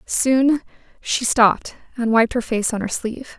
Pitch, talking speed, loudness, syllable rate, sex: 235 Hz, 175 wpm, -19 LUFS, 4.5 syllables/s, female